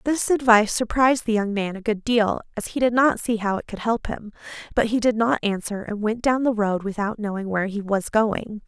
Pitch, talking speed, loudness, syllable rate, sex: 220 Hz, 240 wpm, -22 LUFS, 5.4 syllables/s, female